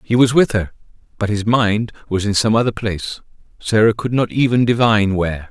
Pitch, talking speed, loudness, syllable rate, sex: 110 Hz, 195 wpm, -17 LUFS, 5.7 syllables/s, male